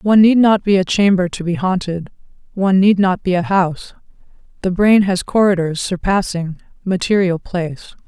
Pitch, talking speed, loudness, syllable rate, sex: 190 Hz, 165 wpm, -16 LUFS, 5.2 syllables/s, female